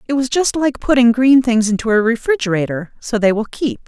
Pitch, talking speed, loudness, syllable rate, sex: 240 Hz, 215 wpm, -15 LUFS, 5.6 syllables/s, female